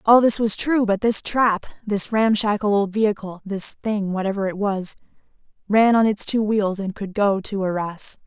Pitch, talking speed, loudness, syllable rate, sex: 205 Hz, 190 wpm, -20 LUFS, 4.7 syllables/s, female